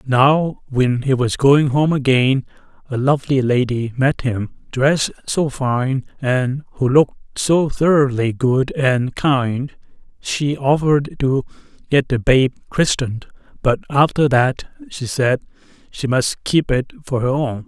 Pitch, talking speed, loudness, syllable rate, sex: 135 Hz, 145 wpm, -18 LUFS, 3.9 syllables/s, male